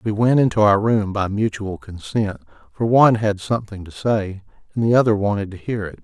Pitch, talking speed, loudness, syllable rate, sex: 105 Hz, 210 wpm, -19 LUFS, 5.5 syllables/s, male